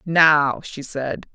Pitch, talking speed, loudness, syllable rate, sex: 150 Hz, 135 wpm, -19 LUFS, 2.6 syllables/s, female